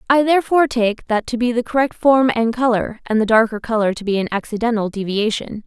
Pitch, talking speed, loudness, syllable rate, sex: 230 Hz, 210 wpm, -18 LUFS, 5.9 syllables/s, female